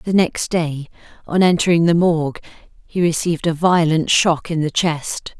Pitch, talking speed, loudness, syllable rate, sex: 165 Hz, 165 wpm, -17 LUFS, 4.7 syllables/s, female